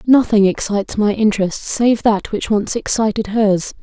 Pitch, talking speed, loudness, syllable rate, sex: 215 Hz, 155 wpm, -16 LUFS, 4.7 syllables/s, female